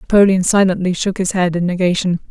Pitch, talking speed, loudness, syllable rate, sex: 185 Hz, 180 wpm, -15 LUFS, 6.6 syllables/s, female